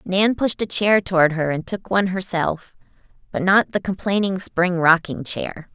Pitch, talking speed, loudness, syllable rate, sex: 185 Hz, 180 wpm, -20 LUFS, 4.5 syllables/s, female